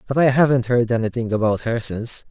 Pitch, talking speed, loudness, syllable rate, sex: 120 Hz, 210 wpm, -19 LUFS, 6.1 syllables/s, male